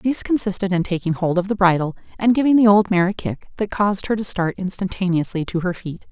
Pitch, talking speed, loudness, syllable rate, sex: 190 Hz, 235 wpm, -20 LUFS, 6.2 syllables/s, female